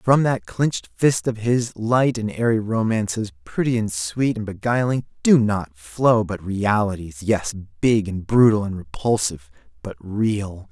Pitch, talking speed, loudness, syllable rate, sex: 110 Hz, 150 wpm, -21 LUFS, 4.1 syllables/s, male